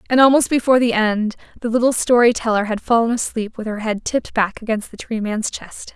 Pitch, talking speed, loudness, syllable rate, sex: 225 Hz, 220 wpm, -18 LUFS, 5.8 syllables/s, female